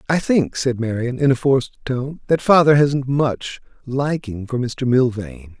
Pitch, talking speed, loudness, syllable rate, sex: 130 Hz, 170 wpm, -19 LUFS, 4.2 syllables/s, male